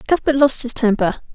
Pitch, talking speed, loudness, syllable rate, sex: 255 Hz, 180 wpm, -16 LUFS, 5.4 syllables/s, female